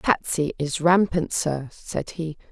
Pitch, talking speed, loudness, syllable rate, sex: 160 Hz, 145 wpm, -24 LUFS, 3.5 syllables/s, female